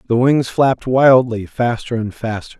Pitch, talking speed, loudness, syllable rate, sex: 120 Hz, 160 wpm, -16 LUFS, 4.6 syllables/s, male